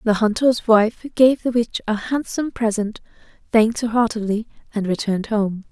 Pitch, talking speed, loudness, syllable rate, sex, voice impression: 225 Hz, 155 wpm, -20 LUFS, 5.1 syllables/s, female, feminine, adult-like, relaxed, slightly weak, soft, muffled, intellectual, calm, slightly friendly, unique, slightly lively, slightly modest